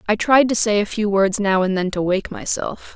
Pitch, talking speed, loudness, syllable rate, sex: 205 Hz, 265 wpm, -19 LUFS, 5.1 syllables/s, female